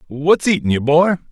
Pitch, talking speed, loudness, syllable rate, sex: 155 Hz, 185 wpm, -15 LUFS, 4.9 syllables/s, male